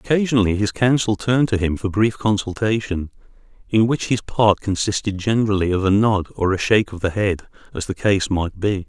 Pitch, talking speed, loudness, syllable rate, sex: 105 Hz, 195 wpm, -19 LUFS, 5.6 syllables/s, male